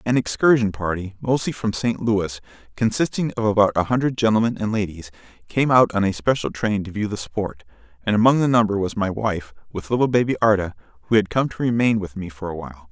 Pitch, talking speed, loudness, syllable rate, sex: 105 Hz, 215 wpm, -21 LUFS, 5.9 syllables/s, male